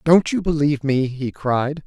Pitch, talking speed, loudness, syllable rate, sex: 145 Hz, 195 wpm, -20 LUFS, 4.5 syllables/s, male